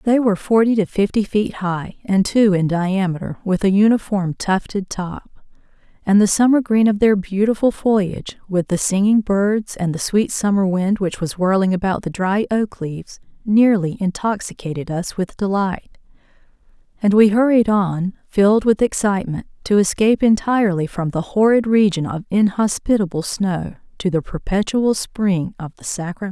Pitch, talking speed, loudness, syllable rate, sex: 200 Hz, 160 wpm, -18 LUFS, 5.0 syllables/s, female